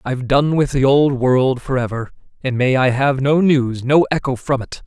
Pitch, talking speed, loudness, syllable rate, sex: 135 Hz, 220 wpm, -17 LUFS, 4.8 syllables/s, male